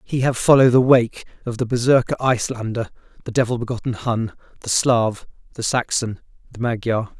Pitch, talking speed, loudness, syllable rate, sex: 120 Hz, 160 wpm, -19 LUFS, 5.4 syllables/s, male